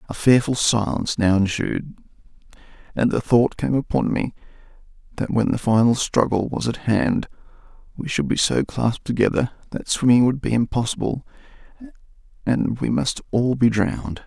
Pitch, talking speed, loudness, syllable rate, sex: 120 Hz, 150 wpm, -21 LUFS, 5.1 syllables/s, male